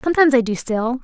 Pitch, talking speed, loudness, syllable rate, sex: 255 Hz, 230 wpm, -17 LUFS, 7.1 syllables/s, female